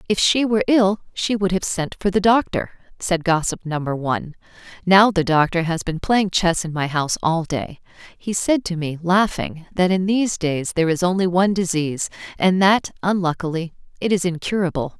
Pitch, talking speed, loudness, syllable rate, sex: 180 Hz, 190 wpm, -20 LUFS, 5.2 syllables/s, female